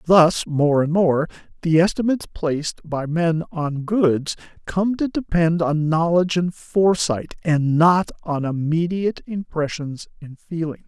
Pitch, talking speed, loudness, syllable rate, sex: 165 Hz, 140 wpm, -20 LUFS, 4.2 syllables/s, male